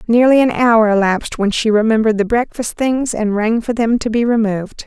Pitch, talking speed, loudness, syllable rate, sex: 225 Hz, 210 wpm, -15 LUFS, 5.5 syllables/s, female